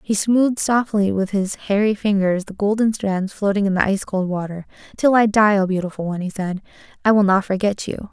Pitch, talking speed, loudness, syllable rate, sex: 200 Hz, 215 wpm, -19 LUFS, 5.6 syllables/s, female